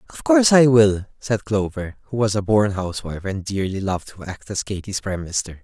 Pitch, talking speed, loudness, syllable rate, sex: 105 Hz, 215 wpm, -20 LUFS, 6.0 syllables/s, male